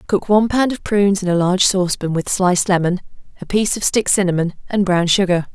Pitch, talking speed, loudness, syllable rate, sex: 190 Hz, 215 wpm, -17 LUFS, 6.4 syllables/s, female